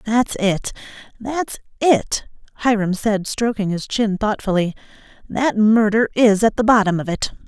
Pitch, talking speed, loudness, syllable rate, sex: 215 Hz, 145 wpm, -19 LUFS, 4.4 syllables/s, female